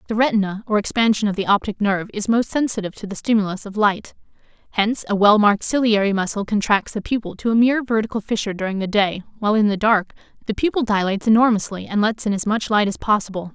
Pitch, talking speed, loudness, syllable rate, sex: 210 Hz, 215 wpm, -19 LUFS, 6.8 syllables/s, female